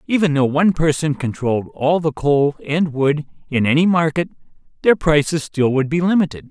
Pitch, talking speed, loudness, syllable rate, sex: 150 Hz, 175 wpm, -18 LUFS, 5.4 syllables/s, male